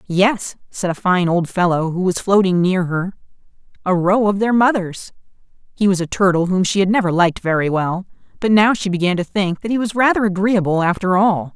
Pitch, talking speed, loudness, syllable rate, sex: 190 Hz, 210 wpm, -17 LUFS, 5.4 syllables/s, female